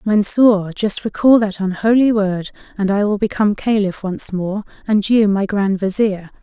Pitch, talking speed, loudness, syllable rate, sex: 205 Hz, 170 wpm, -16 LUFS, 4.5 syllables/s, female